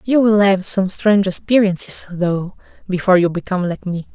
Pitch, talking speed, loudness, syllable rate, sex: 190 Hz, 175 wpm, -16 LUFS, 5.5 syllables/s, female